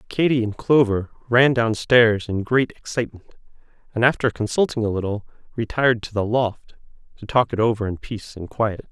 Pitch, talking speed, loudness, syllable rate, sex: 115 Hz, 175 wpm, -21 LUFS, 5.3 syllables/s, male